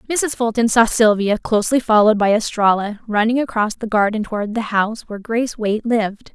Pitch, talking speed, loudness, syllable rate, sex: 220 Hz, 180 wpm, -17 LUFS, 5.9 syllables/s, female